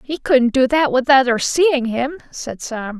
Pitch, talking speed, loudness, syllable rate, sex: 265 Hz, 200 wpm, -16 LUFS, 4.0 syllables/s, female